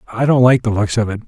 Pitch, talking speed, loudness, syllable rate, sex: 115 Hz, 330 wpm, -15 LUFS, 7.5 syllables/s, male